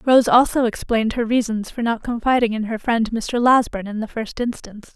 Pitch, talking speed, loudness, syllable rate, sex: 230 Hz, 205 wpm, -19 LUFS, 5.6 syllables/s, female